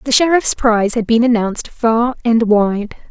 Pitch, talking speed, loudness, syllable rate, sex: 230 Hz, 175 wpm, -14 LUFS, 4.7 syllables/s, female